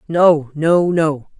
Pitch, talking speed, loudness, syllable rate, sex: 160 Hz, 130 wpm, -15 LUFS, 2.6 syllables/s, female